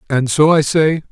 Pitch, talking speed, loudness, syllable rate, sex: 150 Hz, 215 wpm, -14 LUFS, 4.7 syllables/s, male